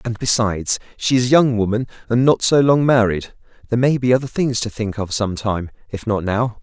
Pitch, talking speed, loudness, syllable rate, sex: 115 Hz, 215 wpm, -18 LUFS, 5.3 syllables/s, male